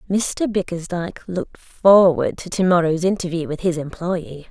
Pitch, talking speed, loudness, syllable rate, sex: 175 Hz, 135 wpm, -19 LUFS, 4.7 syllables/s, female